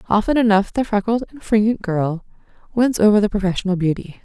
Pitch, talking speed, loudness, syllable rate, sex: 210 Hz, 170 wpm, -18 LUFS, 6.0 syllables/s, female